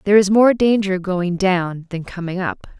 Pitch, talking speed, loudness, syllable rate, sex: 190 Hz, 195 wpm, -17 LUFS, 4.7 syllables/s, female